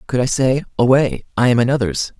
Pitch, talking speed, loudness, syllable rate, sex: 125 Hz, 190 wpm, -17 LUFS, 5.7 syllables/s, male